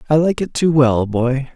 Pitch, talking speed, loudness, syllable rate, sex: 140 Hz, 230 wpm, -16 LUFS, 4.6 syllables/s, male